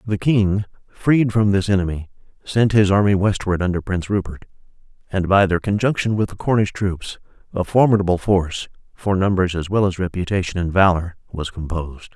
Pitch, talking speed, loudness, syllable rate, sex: 95 Hz, 170 wpm, -19 LUFS, 5.5 syllables/s, male